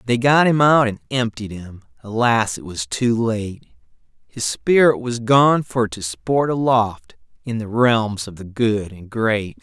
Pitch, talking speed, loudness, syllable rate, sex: 115 Hz, 175 wpm, -19 LUFS, 3.8 syllables/s, male